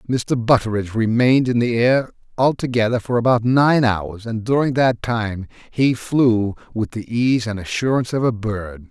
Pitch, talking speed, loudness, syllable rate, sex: 115 Hz, 170 wpm, -19 LUFS, 4.7 syllables/s, male